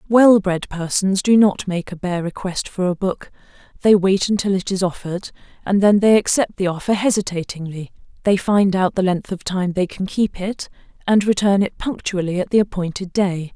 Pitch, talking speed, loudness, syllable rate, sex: 190 Hz, 195 wpm, -19 LUFS, 5.1 syllables/s, female